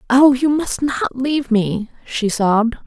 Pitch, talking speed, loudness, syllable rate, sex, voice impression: 245 Hz, 170 wpm, -17 LUFS, 4.1 syllables/s, female, feminine, adult-like, slightly muffled, slightly cool, calm